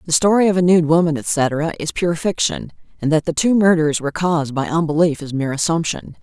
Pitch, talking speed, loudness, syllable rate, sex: 165 Hz, 210 wpm, -17 LUFS, 5.8 syllables/s, female